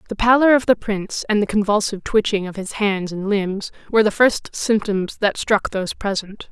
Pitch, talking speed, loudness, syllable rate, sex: 205 Hz, 200 wpm, -19 LUFS, 5.3 syllables/s, female